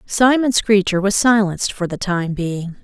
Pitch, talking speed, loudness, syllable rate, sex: 200 Hz, 170 wpm, -17 LUFS, 4.5 syllables/s, female